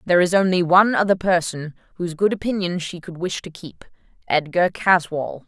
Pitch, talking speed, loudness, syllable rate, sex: 175 Hz, 165 wpm, -20 LUFS, 5.5 syllables/s, female